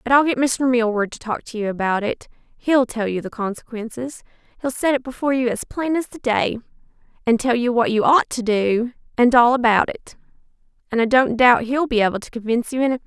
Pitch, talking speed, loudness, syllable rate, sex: 245 Hz, 215 wpm, -20 LUFS, 6.0 syllables/s, female